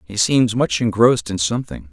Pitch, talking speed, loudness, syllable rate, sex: 110 Hz, 190 wpm, -17 LUFS, 5.5 syllables/s, male